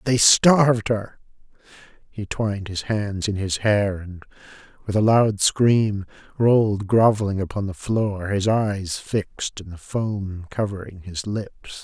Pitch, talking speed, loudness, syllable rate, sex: 105 Hz, 145 wpm, -21 LUFS, 3.9 syllables/s, male